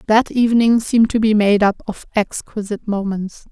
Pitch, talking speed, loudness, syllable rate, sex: 215 Hz, 170 wpm, -17 LUFS, 5.4 syllables/s, female